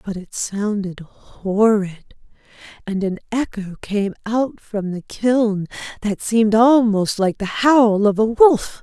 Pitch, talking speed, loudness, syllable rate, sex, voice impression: 215 Hz, 145 wpm, -18 LUFS, 3.6 syllables/s, female, very feminine, adult-like, slightly middle-aged, very thin, slightly relaxed, slightly weak, bright, soft, clear, slightly fluent, slightly raspy, slightly cool, very intellectual, refreshing, sincere, slightly calm, friendly, reassuring, slightly unique, slightly elegant, slightly wild, lively, kind, slightly modest